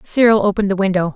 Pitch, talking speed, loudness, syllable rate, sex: 200 Hz, 210 wpm, -15 LUFS, 7.6 syllables/s, female